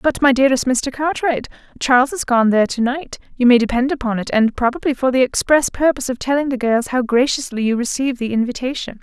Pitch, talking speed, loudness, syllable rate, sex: 255 Hz, 215 wpm, -17 LUFS, 6.1 syllables/s, female